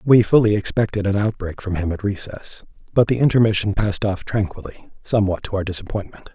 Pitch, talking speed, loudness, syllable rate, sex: 100 Hz, 180 wpm, -20 LUFS, 6.1 syllables/s, male